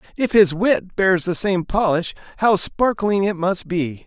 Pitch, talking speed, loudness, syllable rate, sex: 185 Hz, 175 wpm, -19 LUFS, 4.1 syllables/s, male